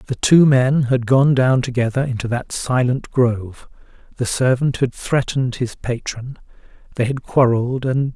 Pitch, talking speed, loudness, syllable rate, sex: 125 Hz, 155 wpm, -18 LUFS, 4.5 syllables/s, male